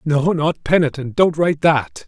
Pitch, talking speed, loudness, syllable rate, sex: 150 Hz, 175 wpm, -17 LUFS, 4.6 syllables/s, male